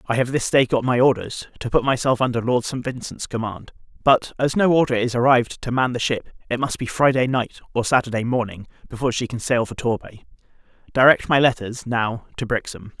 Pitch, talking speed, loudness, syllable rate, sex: 125 Hz, 210 wpm, -21 LUFS, 5.7 syllables/s, male